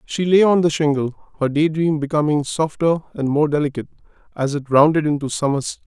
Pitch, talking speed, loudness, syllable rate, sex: 150 Hz, 190 wpm, -19 LUFS, 5.8 syllables/s, male